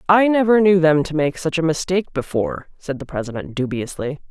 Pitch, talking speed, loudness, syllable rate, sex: 160 Hz, 195 wpm, -19 LUFS, 5.8 syllables/s, female